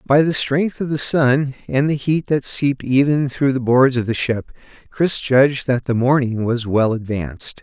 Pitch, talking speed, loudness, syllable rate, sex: 130 Hz, 205 wpm, -18 LUFS, 4.6 syllables/s, male